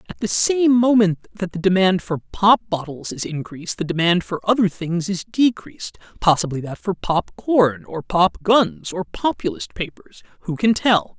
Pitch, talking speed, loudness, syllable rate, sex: 180 Hz, 170 wpm, -20 LUFS, 4.5 syllables/s, male